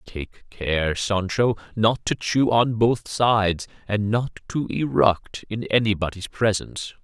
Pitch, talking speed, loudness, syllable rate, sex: 105 Hz, 135 wpm, -22 LUFS, 4.0 syllables/s, male